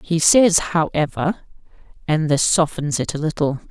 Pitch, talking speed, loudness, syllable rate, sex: 160 Hz, 145 wpm, -18 LUFS, 4.4 syllables/s, female